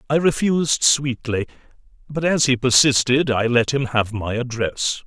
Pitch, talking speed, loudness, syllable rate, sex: 130 Hz, 155 wpm, -19 LUFS, 4.5 syllables/s, male